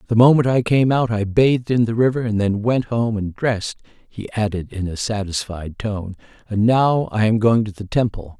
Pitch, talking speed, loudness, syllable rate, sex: 110 Hz, 215 wpm, -19 LUFS, 5.0 syllables/s, male